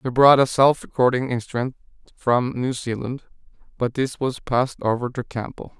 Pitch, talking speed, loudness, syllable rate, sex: 125 Hz, 165 wpm, -21 LUFS, 5.1 syllables/s, male